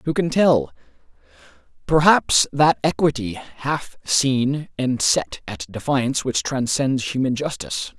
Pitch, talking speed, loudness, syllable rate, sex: 125 Hz, 120 wpm, -20 LUFS, 3.8 syllables/s, male